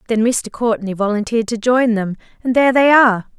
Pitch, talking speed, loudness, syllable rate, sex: 230 Hz, 195 wpm, -15 LUFS, 6.0 syllables/s, female